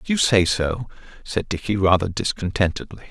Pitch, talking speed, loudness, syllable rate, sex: 100 Hz, 155 wpm, -21 LUFS, 5.4 syllables/s, male